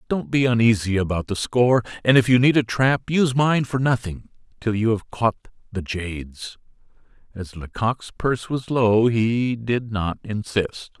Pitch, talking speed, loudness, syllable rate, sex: 115 Hz, 170 wpm, -21 LUFS, 4.6 syllables/s, male